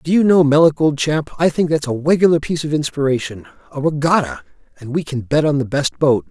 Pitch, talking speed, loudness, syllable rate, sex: 145 Hz, 230 wpm, -17 LUFS, 5.9 syllables/s, male